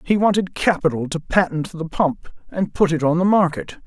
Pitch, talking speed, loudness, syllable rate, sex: 170 Hz, 200 wpm, -19 LUFS, 5.0 syllables/s, male